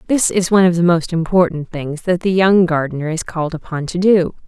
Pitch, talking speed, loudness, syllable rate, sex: 170 Hz, 230 wpm, -16 LUFS, 5.7 syllables/s, female